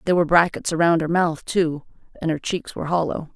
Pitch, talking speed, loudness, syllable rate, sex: 165 Hz, 215 wpm, -21 LUFS, 6.4 syllables/s, female